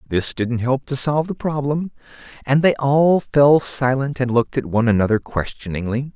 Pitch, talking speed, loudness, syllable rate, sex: 130 Hz, 175 wpm, -18 LUFS, 5.2 syllables/s, male